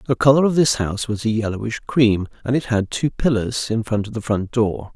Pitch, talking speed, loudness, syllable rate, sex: 115 Hz, 240 wpm, -20 LUFS, 5.5 syllables/s, male